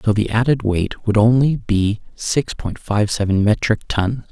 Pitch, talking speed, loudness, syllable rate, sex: 110 Hz, 180 wpm, -18 LUFS, 4.2 syllables/s, male